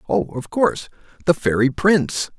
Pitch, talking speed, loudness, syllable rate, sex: 155 Hz, 150 wpm, -19 LUFS, 5.0 syllables/s, male